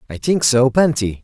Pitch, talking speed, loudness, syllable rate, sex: 130 Hz, 195 wpm, -16 LUFS, 4.8 syllables/s, male